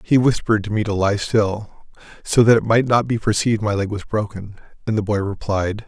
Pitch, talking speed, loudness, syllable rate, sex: 105 Hz, 225 wpm, -19 LUFS, 5.5 syllables/s, male